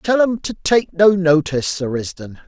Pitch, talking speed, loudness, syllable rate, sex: 175 Hz, 195 wpm, -17 LUFS, 4.7 syllables/s, male